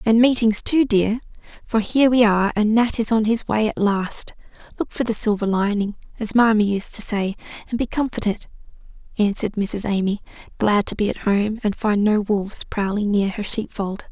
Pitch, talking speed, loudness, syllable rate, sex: 215 Hz, 190 wpm, -20 LUFS, 5.2 syllables/s, female